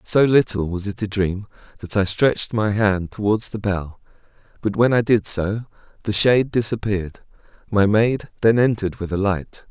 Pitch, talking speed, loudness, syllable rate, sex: 105 Hz, 180 wpm, -20 LUFS, 4.9 syllables/s, male